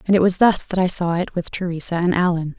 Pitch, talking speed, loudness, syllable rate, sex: 175 Hz, 280 wpm, -19 LUFS, 6.1 syllables/s, female